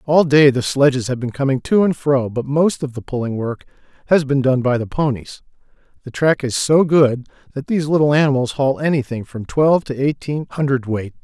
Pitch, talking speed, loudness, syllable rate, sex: 135 Hz, 205 wpm, -17 LUFS, 5.5 syllables/s, male